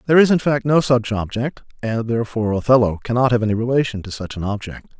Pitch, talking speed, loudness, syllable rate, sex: 120 Hz, 215 wpm, -19 LUFS, 6.6 syllables/s, male